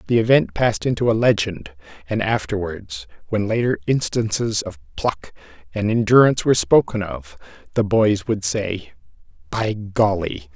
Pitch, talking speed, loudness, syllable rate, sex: 110 Hz, 135 wpm, -20 LUFS, 4.7 syllables/s, male